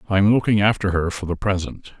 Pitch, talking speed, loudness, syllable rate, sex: 100 Hz, 240 wpm, -20 LUFS, 6.2 syllables/s, male